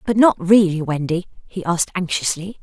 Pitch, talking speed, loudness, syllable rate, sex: 180 Hz, 160 wpm, -18 LUFS, 5.3 syllables/s, female